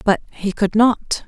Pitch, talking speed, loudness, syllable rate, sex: 210 Hz, 190 wpm, -18 LUFS, 3.7 syllables/s, female